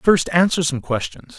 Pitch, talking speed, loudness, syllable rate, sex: 145 Hz, 175 wpm, -19 LUFS, 4.4 syllables/s, male